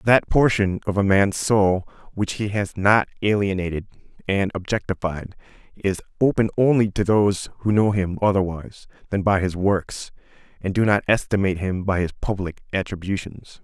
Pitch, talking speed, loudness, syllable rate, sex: 100 Hz, 155 wpm, -21 LUFS, 5.2 syllables/s, male